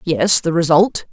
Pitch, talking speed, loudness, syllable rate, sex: 170 Hz, 160 wpm, -14 LUFS, 4.0 syllables/s, female